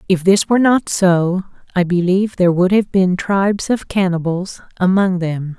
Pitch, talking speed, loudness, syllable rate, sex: 185 Hz, 170 wpm, -16 LUFS, 4.9 syllables/s, female